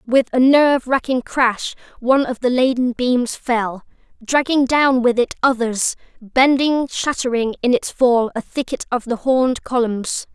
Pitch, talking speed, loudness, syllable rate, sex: 250 Hz, 155 wpm, -18 LUFS, 4.3 syllables/s, female